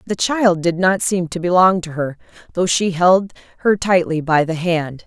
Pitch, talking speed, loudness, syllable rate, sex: 175 Hz, 200 wpm, -17 LUFS, 4.5 syllables/s, female